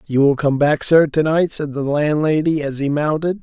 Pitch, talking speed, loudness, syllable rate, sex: 150 Hz, 230 wpm, -17 LUFS, 4.8 syllables/s, male